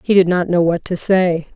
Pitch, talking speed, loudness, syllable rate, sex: 175 Hz, 270 wpm, -16 LUFS, 4.9 syllables/s, female